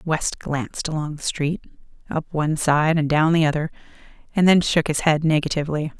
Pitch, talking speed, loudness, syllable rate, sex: 155 Hz, 160 wpm, -21 LUFS, 5.5 syllables/s, female